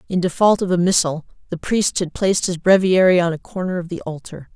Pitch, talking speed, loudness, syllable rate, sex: 180 Hz, 225 wpm, -18 LUFS, 5.8 syllables/s, female